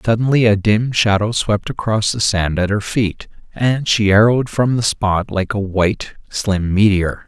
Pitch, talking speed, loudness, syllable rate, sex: 105 Hz, 180 wpm, -16 LUFS, 4.5 syllables/s, male